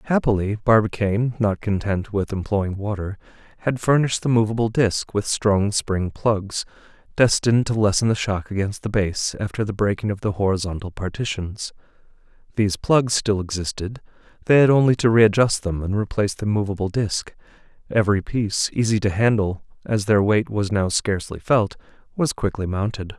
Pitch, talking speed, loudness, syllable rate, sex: 105 Hz, 160 wpm, -21 LUFS, 5.3 syllables/s, male